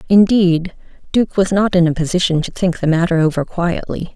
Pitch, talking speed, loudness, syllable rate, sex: 175 Hz, 190 wpm, -16 LUFS, 5.3 syllables/s, female